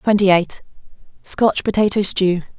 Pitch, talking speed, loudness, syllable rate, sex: 195 Hz, 95 wpm, -17 LUFS, 4.4 syllables/s, female